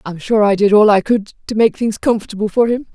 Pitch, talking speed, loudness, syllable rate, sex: 215 Hz, 265 wpm, -15 LUFS, 5.7 syllables/s, female